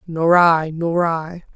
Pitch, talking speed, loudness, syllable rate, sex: 165 Hz, 115 wpm, -17 LUFS, 3.0 syllables/s, female